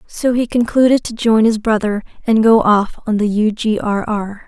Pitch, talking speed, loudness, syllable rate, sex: 220 Hz, 215 wpm, -15 LUFS, 4.7 syllables/s, female